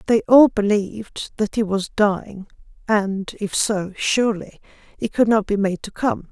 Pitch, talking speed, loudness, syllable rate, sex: 210 Hz, 170 wpm, -20 LUFS, 4.4 syllables/s, female